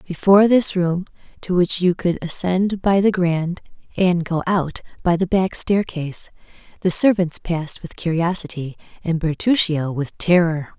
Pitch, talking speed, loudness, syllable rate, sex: 175 Hz, 150 wpm, -19 LUFS, 4.6 syllables/s, female